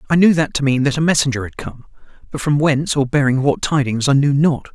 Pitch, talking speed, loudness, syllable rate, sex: 140 Hz, 255 wpm, -16 LUFS, 6.2 syllables/s, male